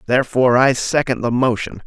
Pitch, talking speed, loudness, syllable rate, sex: 125 Hz, 160 wpm, -17 LUFS, 5.9 syllables/s, male